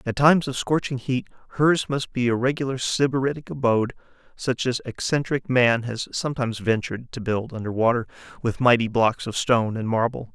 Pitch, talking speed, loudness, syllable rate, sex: 125 Hz, 175 wpm, -23 LUFS, 5.7 syllables/s, male